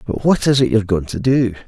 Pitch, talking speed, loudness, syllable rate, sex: 115 Hz, 285 wpm, -16 LUFS, 6.3 syllables/s, male